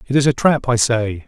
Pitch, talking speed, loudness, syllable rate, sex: 125 Hz, 280 wpm, -16 LUFS, 5.2 syllables/s, male